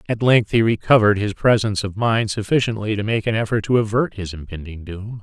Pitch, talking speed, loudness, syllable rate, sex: 105 Hz, 205 wpm, -19 LUFS, 5.9 syllables/s, male